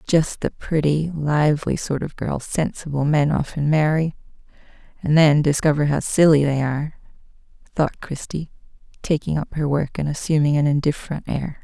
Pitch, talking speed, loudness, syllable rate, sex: 150 Hz, 150 wpm, -21 LUFS, 5.0 syllables/s, female